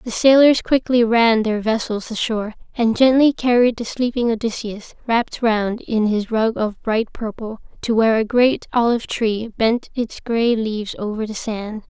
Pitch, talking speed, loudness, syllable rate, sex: 230 Hz, 170 wpm, -18 LUFS, 4.7 syllables/s, female